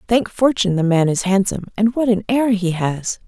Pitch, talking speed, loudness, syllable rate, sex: 205 Hz, 220 wpm, -18 LUFS, 5.5 syllables/s, female